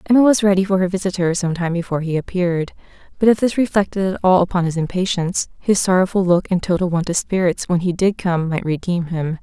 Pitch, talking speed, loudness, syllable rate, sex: 180 Hz, 225 wpm, -18 LUFS, 6.2 syllables/s, female